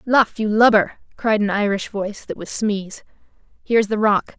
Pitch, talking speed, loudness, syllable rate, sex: 210 Hz, 180 wpm, -19 LUFS, 5.0 syllables/s, female